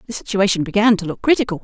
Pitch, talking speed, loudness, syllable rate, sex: 205 Hz, 220 wpm, -17 LUFS, 7.5 syllables/s, female